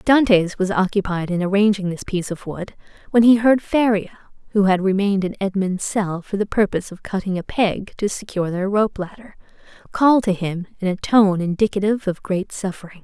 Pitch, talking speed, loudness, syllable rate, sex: 195 Hz, 190 wpm, -20 LUFS, 5.5 syllables/s, female